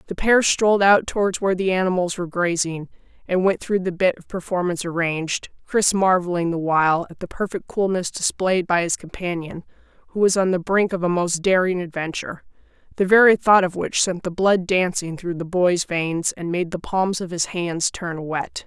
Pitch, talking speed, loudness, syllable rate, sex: 180 Hz, 200 wpm, -21 LUFS, 5.2 syllables/s, female